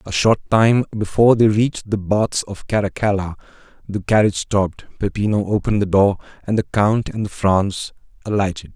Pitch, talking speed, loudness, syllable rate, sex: 100 Hz, 160 wpm, -18 LUFS, 5.3 syllables/s, male